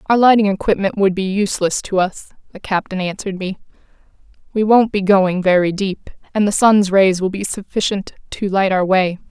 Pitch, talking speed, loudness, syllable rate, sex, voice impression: 195 Hz, 185 wpm, -16 LUFS, 5.3 syllables/s, female, very feminine, slightly young, slightly adult-like, thin, slightly relaxed, slightly weak, slightly dark, hard, clear, fluent, cute, intellectual, slightly refreshing, sincere, calm, friendly, reassuring, slightly unique, elegant, slightly sweet, very kind, slightly modest